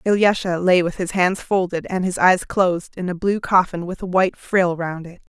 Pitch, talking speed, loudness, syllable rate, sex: 180 Hz, 225 wpm, -19 LUFS, 5.1 syllables/s, female